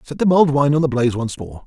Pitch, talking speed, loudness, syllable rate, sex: 140 Hz, 325 wpm, -17 LUFS, 7.3 syllables/s, male